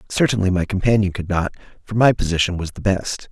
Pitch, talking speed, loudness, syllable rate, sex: 95 Hz, 200 wpm, -19 LUFS, 6.1 syllables/s, male